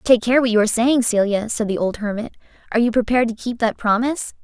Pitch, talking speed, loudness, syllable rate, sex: 230 Hz, 245 wpm, -19 LUFS, 6.6 syllables/s, female